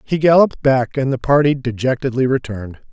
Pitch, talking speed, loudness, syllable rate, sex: 130 Hz, 165 wpm, -16 LUFS, 5.9 syllables/s, male